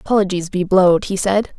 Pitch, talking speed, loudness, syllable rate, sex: 190 Hz, 190 wpm, -16 LUFS, 5.2 syllables/s, female